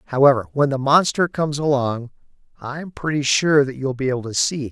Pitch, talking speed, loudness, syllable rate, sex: 140 Hz, 230 wpm, -19 LUFS, 6.3 syllables/s, male